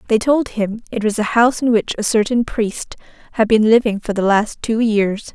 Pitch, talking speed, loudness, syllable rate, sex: 220 Hz, 225 wpm, -17 LUFS, 5.0 syllables/s, female